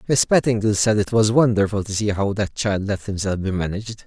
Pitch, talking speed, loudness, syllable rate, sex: 105 Hz, 220 wpm, -20 LUFS, 5.7 syllables/s, male